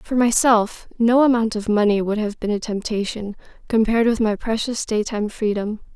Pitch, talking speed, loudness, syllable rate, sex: 220 Hz, 170 wpm, -20 LUFS, 5.2 syllables/s, female